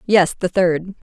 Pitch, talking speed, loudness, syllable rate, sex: 180 Hz, 165 wpm, -18 LUFS, 4.1 syllables/s, female